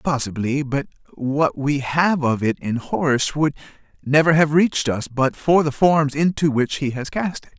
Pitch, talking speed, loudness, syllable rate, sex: 145 Hz, 190 wpm, -20 LUFS, 4.6 syllables/s, male